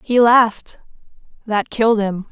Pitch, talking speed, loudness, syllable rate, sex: 220 Hz, 130 wpm, -16 LUFS, 4.5 syllables/s, female